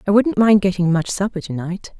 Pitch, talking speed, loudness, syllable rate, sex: 195 Hz, 210 wpm, -18 LUFS, 5.5 syllables/s, female